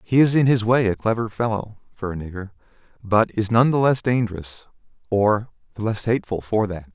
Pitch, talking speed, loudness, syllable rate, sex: 110 Hz, 190 wpm, -21 LUFS, 5.5 syllables/s, male